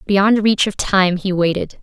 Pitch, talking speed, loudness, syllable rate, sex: 195 Hz, 195 wpm, -16 LUFS, 4.1 syllables/s, female